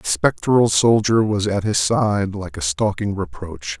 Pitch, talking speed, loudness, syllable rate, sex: 100 Hz, 175 wpm, -19 LUFS, 4.0 syllables/s, male